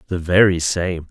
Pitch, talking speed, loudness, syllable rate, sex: 90 Hz, 165 wpm, -17 LUFS, 4.4 syllables/s, male